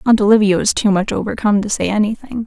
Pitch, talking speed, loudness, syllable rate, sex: 210 Hz, 220 wpm, -15 LUFS, 6.8 syllables/s, female